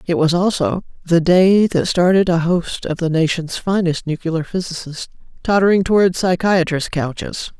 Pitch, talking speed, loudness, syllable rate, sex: 170 Hz, 150 wpm, -17 LUFS, 4.6 syllables/s, female